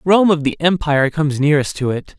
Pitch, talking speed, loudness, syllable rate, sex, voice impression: 155 Hz, 220 wpm, -16 LUFS, 6.2 syllables/s, male, masculine, adult-like, tensed, powerful, bright, clear, fluent, intellectual, friendly, slightly unique, wild, lively, slightly sharp